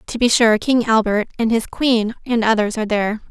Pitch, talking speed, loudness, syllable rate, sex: 225 Hz, 220 wpm, -17 LUFS, 5.5 syllables/s, female